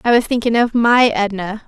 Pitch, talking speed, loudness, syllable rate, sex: 225 Hz, 215 wpm, -15 LUFS, 5.3 syllables/s, female